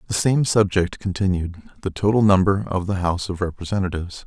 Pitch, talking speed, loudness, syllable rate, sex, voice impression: 95 Hz, 170 wpm, -21 LUFS, 2.6 syllables/s, male, masculine, adult-like, tensed, powerful, hard, clear, fluent, cool, intellectual, calm, slightly mature, reassuring, wild, slightly lively, slightly strict